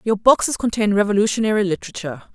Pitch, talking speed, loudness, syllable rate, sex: 210 Hz, 130 wpm, -19 LUFS, 7.2 syllables/s, female